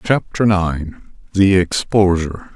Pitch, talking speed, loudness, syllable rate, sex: 95 Hz, 70 wpm, -16 LUFS, 3.9 syllables/s, male